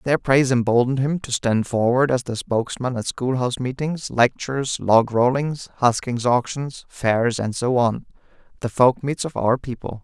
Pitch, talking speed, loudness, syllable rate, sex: 125 Hz, 160 wpm, -21 LUFS, 4.8 syllables/s, male